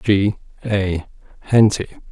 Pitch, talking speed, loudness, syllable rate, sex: 100 Hz, 85 wpm, -18 LUFS, 3.3 syllables/s, male